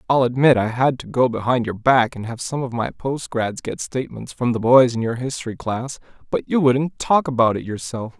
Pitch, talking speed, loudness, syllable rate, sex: 125 Hz, 225 wpm, -20 LUFS, 5.2 syllables/s, male